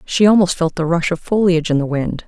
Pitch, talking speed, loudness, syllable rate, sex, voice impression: 170 Hz, 265 wpm, -16 LUFS, 6.0 syllables/s, female, feminine, adult-like, slightly dark, slightly cool, calm, slightly reassuring